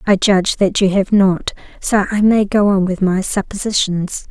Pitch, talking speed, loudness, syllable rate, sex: 195 Hz, 195 wpm, -15 LUFS, 4.6 syllables/s, female